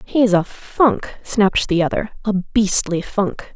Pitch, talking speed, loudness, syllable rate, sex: 200 Hz, 150 wpm, -18 LUFS, 3.7 syllables/s, female